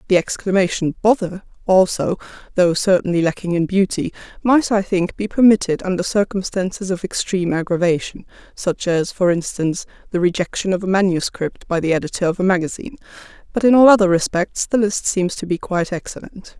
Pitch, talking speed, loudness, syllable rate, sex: 185 Hz, 165 wpm, -18 LUFS, 5.7 syllables/s, female